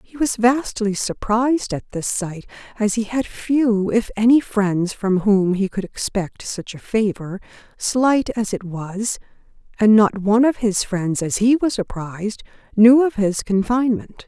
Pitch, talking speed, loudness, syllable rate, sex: 215 Hz, 170 wpm, -19 LUFS, 4.2 syllables/s, female